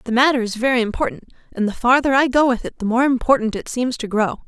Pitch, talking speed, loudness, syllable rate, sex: 240 Hz, 255 wpm, -18 LUFS, 6.5 syllables/s, female